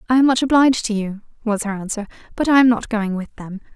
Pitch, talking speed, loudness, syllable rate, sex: 225 Hz, 255 wpm, -18 LUFS, 6.5 syllables/s, female